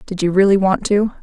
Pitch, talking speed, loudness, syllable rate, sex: 195 Hz, 245 wpm, -15 LUFS, 5.7 syllables/s, female